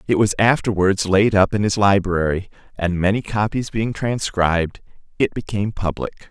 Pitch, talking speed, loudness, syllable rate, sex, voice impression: 100 Hz, 150 wpm, -19 LUFS, 5.0 syllables/s, male, very masculine, middle-aged, thick, very tensed, powerful, very bright, soft, very clear, very fluent, slightly raspy, cool, intellectual, very refreshing, sincere, calm, very mature, very friendly, very reassuring, unique, very elegant, wild, very sweet, lively, very kind, slightly modest